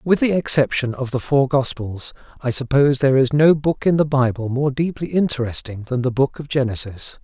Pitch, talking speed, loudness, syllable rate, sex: 135 Hz, 200 wpm, -19 LUFS, 5.4 syllables/s, male